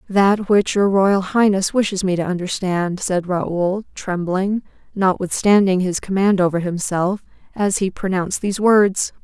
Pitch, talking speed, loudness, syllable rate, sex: 190 Hz, 145 wpm, -18 LUFS, 4.4 syllables/s, female